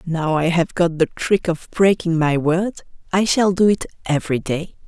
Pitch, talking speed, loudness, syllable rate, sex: 170 Hz, 195 wpm, -19 LUFS, 4.6 syllables/s, female